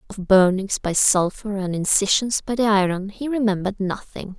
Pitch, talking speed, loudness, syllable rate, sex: 200 Hz, 165 wpm, -20 LUFS, 5.0 syllables/s, female